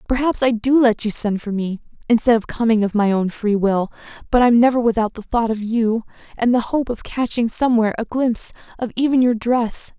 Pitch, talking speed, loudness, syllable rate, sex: 230 Hz, 215 wpm, -19 LUFS, 5.6 syllables/s, female